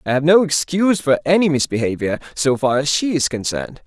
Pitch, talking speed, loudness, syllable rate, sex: 150 Hz, 185 wpm, -17 LUFS, 5.9 syllables/s, male